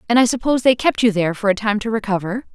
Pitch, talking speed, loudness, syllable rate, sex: 220 Hz, 285 wpm, -18 LUFS, 7.3 syllables/s, female